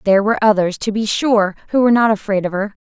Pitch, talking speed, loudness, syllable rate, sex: 205 Hz, 255 wpm, -16 LUFS, 6.9 syllables/s, female